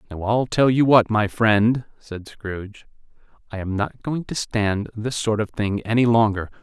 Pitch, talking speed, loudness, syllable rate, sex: 110 Hz, 190 wpm, -21 LUFS, 4.3 syllables/s, male